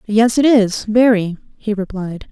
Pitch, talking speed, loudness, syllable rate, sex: 215 Hz, 155 wpm, -15 LUFS, 3.9 syllables/s, female